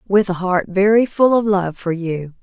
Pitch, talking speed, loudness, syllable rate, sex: 190 Hz, 220 wpm, -17 LUFS, 4.5 syllables/s, female